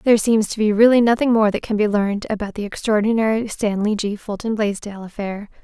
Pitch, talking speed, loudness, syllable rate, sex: 215 Hz, 200 wpm, -19 LUFS, 6.0 syllables/s, female